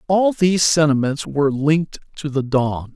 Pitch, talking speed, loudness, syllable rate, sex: 150 Hz, 165 wpm, -18 LUFS, 5.0 syllables/s, male